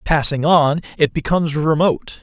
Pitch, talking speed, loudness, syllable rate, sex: 155 Hz, 135 wpm, -17 LUFS, 5.1 syllables/s, male